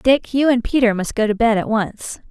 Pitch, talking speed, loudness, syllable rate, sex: 230 Hz, 260 wpm, -18 LUFS, 5.0 syllables/s, female